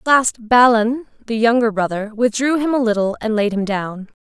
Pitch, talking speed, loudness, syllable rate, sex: 230 Hz, 200 wpm, -17 LUFS, 5.0 syllables/s, female